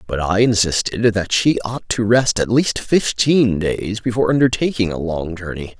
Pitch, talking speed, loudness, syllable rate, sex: 105 Hz, 175 wpm, -17 LUFS, 4.6 syllables/s, male